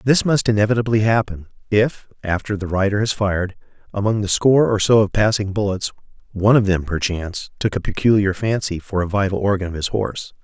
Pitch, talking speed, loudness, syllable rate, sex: 100 Hz, 190 wpm, -19 LUFS, 6.0 syllables/s, male